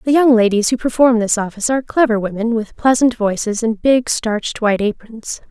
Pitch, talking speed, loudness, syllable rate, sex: 230 Hz, 195 wpm, -16 LUFS, 5.6 syllables/s, female